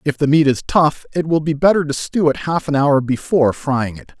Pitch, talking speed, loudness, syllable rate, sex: 145 Hz, 255 wpm, -17 LUFS, 5.3 syllables/s, male